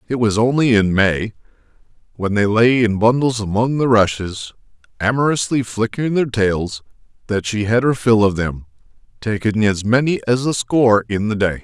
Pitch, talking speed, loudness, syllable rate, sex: 110 Hz, 170 wpm, -17 LUFS, 4.9 syllables/s, male